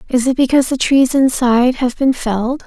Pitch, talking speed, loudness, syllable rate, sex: 255 Hz, 200 wpm, -14 LUFS, 5.6 syllables/s, female